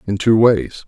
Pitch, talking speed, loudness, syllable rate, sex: 105 Hz, 205 wpm, -15 LUFS, 4.2 syllables/s, male